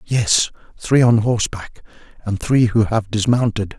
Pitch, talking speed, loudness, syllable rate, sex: 110 Hz, 145 wpm, -17 LUFS, 4.4 syllables/s, male